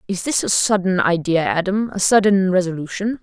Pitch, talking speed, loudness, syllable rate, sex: 190 Hz, 165 wpm, -18 LUFS, 5.3 syllables/s, female